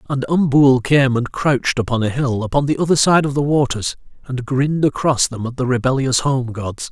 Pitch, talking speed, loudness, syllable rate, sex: 130 Hz, 210 wpm, -17 LUFS, 5.4 syllables/s, male